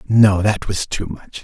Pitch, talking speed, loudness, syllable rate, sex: 100 Hz, 210 wpm, -17 LUFS, 3.9 syllables/s, male